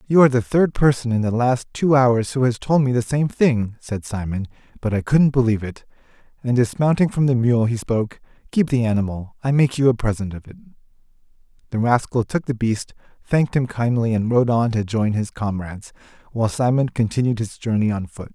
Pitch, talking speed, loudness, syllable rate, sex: 120 Hz, 205 wpm, -20 LUFS, 5.6 syllables/s, male